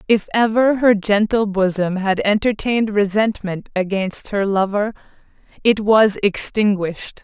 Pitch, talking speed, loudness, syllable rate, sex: 205 Hz, 115 wpm, -18 LUFS, 4.3 syllables/s, female